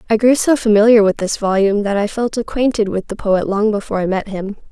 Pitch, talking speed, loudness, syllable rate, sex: 210 Hz, 240 wpm, -16 LUFS, 6.1 syllables/s, female